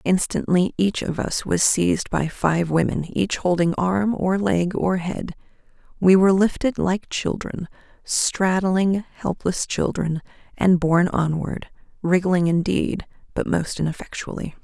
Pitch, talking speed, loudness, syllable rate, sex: 180 Hz, 130 wpm, -21 LUFS, 4.1 syllables/s, female